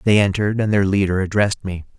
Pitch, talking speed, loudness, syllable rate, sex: 100 Hz, 210 wpm, -18 LUFS, 6.8 syllables/s, male